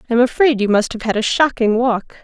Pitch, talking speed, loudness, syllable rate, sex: 235 Hz, 270 wpm, -16 LUFS, 6.0 syllables/s, female